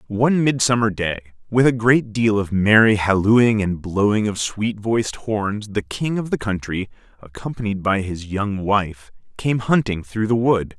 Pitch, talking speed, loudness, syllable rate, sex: 105 Hz, 170 wpm, -19 LUFS, 4.4 syllables/s, male